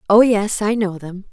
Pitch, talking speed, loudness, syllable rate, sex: 205 Hz, 225 wpm, -17 LUFS, 4.6 syllables/s, female